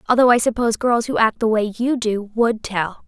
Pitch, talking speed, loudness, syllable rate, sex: 225 Hz, 235 wpm, -19 LUFS, 5.3 syllables/s, female